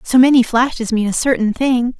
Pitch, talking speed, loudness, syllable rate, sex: 245 Hz, 210 wpm, -15 LUFS, 5.3 syllables/s, female